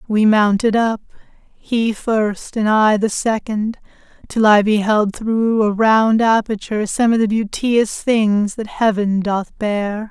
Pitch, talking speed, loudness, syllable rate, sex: 215 Hz, 150 wpm, -17 LUFS, 3.7 syllables/s, female